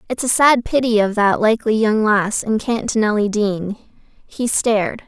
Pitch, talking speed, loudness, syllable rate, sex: 215 Hz, 175 wpm, -17 LUFS, 4.3 syllables/s, female